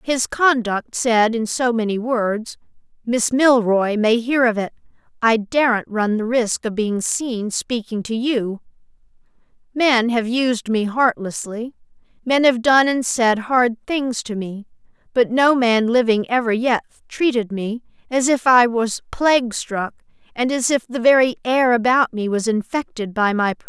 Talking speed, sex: 165 wpm, female